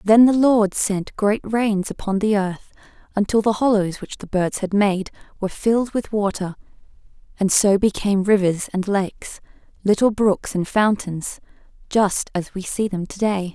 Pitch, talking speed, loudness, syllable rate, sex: 200 Hz, 170 wpm, -20 LUFS, 4.5 syllables/s, female